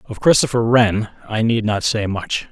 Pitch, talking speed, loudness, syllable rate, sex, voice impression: 110 Hz, 190 wpm, -18 LUFS, 4.5 syllables/s, male, very masculine, middle-aged, slightly thick, sincere, slightly calm, slightly unique